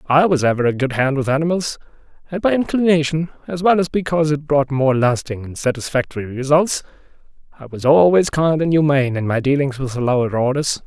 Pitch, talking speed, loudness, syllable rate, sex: 145 Hz, 195 wpm, -18 LUFS, 5.9 syllables/s, male